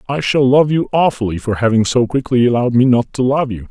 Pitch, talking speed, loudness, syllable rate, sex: 125 Hz, 245 wpm, -14 LUFS, 6.0 syllables/s, male